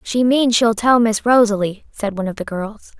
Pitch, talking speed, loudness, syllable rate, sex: 220 Hz, 240 wpm, -17 LUFS, 5.3 syllables/s, female